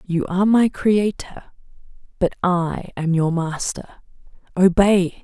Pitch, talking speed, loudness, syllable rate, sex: 185 Hz, 115 wpm, -19 LUFS, 3.9 syllables/s, female